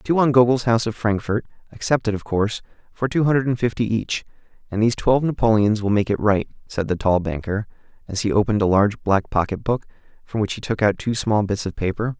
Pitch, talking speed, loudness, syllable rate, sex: 110 Hz, 210 wpm, -21 LUFS, 6.2 syllables/s, male